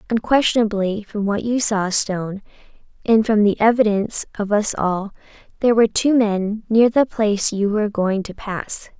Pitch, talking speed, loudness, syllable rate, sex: 210 Hz, 165 wpm, -19 LUFS, 5.0 syllables/s, female